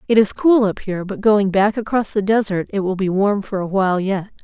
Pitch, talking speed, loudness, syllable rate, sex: 200 Hz, 255 wpm, -18 LUFS, 5.6 syllables/s, female